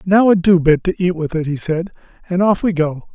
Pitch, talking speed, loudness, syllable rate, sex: 175 Hz, 265 wpm, -16 LUFS, 5.4 syllables/s, male